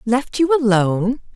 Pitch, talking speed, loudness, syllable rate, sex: 240 Hz, 135 wpm, -17 LUFS, 4.5 syllables/s, female